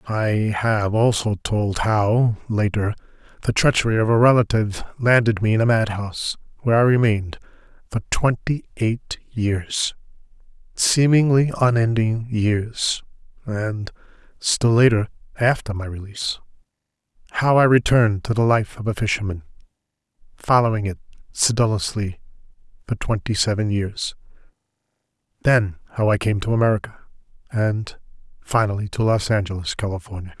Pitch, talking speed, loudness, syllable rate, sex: 110 Hz, 115 wpm, -20 LUFS, 4.9 syllables/s, male